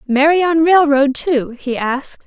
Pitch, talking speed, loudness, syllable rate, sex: 290 Hz, 160 wpm, -14 LUFS, 4.4 syllables/s, female